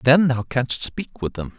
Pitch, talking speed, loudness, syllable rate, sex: 130 Hz, 225 wpm, -22 LUFS, 4.1 syllables/s, male